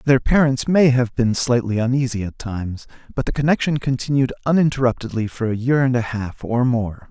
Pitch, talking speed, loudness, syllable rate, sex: 125 Hz, 185 wpm, -19 LUFS, 5.5 syllables/s, male